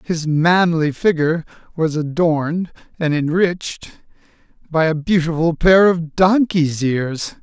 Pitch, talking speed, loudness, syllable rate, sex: 165 Hz, 115 wpm, -17 LUFS, 4.0 syllables/s, male